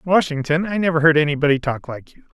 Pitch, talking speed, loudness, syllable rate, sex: 155 Hz, 200 wpm, -18 LUFS, 6.3 syllables/s, male